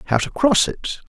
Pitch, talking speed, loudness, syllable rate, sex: 185 Hz, 215 wpm, -19 LUFS, 4.0 syllables/s, male